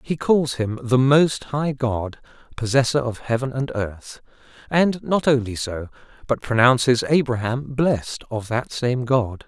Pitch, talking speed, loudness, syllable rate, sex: 125 Hz, 150 wpm, -21 LUFS, 4.1 syllables/s, male